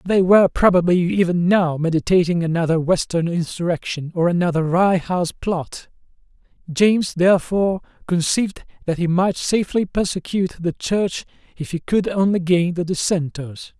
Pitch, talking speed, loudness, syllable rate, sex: 175 Hz, 135 wpm, -19 LUFS, 5.1 syllables/s, male